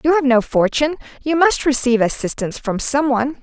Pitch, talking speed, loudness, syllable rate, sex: 265 Hz, 175 wpm, -17 LUFS, 6.3 syllables/s, female